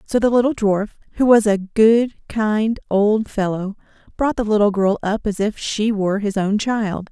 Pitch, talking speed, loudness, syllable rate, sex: 210 Hz, 195 wpm, -18 LUFS, 4.6 syllables/s, female